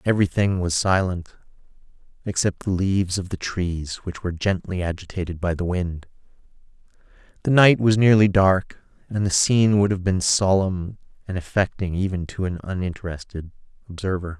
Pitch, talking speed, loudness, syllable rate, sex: 95 Hz, 145 wpm, -22 LUFS, 5.2 syllables/s, male